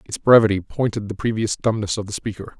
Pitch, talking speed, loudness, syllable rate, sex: 105 Hz, 210 wpm, -20 LUFS, 6.2 syllables/s, male